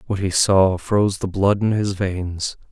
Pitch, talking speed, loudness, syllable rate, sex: 95 Hz, 200 wpm, -19 LUFS, 4.1 syllables/s, male